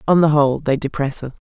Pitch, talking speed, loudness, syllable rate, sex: 145 Hz, 245 wpm, -18 LUFS, 6.6 syllables/s, female